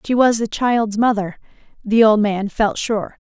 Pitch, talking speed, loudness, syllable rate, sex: 220 Hz, 185 wpm, -17 LUFS, 4.2 syllables/s, female